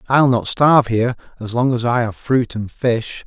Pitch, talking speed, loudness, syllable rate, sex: 120 Hz, 220 wpm, -17 LUFS, 4.9 syllables/s, male